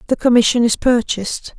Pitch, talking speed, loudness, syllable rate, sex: 235 Hz, 150 wpm, -15 LUFS, 5.8 syllables/s, female